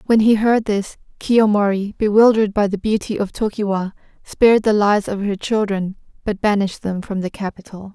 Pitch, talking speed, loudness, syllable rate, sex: 205 Hz, 175 wpm, -18 LUFS, 5.4 syllables/s, female